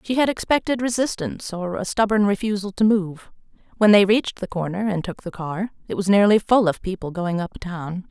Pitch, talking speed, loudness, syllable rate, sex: 200 Hz, 200 wpm, -21 LUFS, 5.4 syllables/s, female